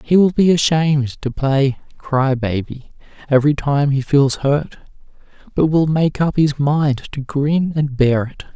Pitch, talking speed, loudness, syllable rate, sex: 145 Hz, 170 wpm, -17 LUFS, 4.2 syllables/s, male